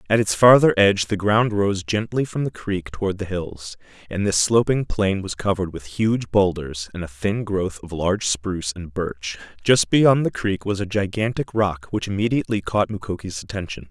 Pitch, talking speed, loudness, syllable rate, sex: 100 Hz, 195 wpm, -21 LUFS, 5.0 syllables/s, male